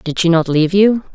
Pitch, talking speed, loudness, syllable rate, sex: 180 Hz, 260 wpm, -13 LUFS, 5.8 syllables/s, female